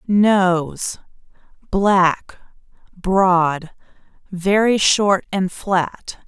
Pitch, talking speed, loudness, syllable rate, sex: 190 Hz, 55 wpm, -17 LUFS, 1.9 syllables/s, female